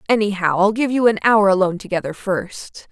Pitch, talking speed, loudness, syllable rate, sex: 200 Hz, 185 wpm, -18 LUFS, 5.7 syllables/s, female